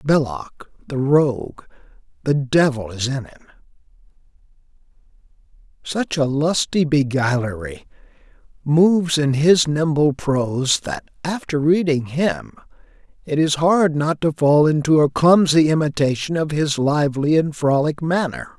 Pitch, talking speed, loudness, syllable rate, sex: 150 Hz, 115 wpm, -18 LUFS, 4.4 syllables/s, male